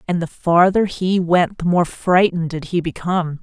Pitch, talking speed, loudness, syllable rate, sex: 175 Hz, 195 wpm, -18 LUFS, 4.9 syllables/s, female